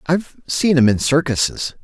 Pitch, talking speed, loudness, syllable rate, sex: 150 Hz, 130 wpm, -17 LUFS, 4.9 syllables/s, male